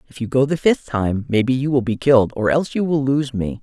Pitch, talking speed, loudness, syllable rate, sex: 130 Hz, 280 wpm, -18 LUFS, 5.9 syllables/s, female